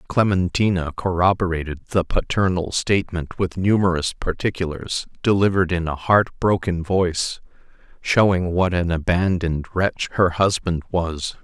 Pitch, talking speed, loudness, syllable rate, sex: 90 Hz, 115 wpm, -21 LUFS, 4.7 syllables/s, male